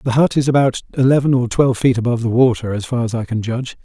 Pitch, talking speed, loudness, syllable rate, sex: 125 Hz, 265 wpm, -16 LUFS, 7.0 syllables/s, male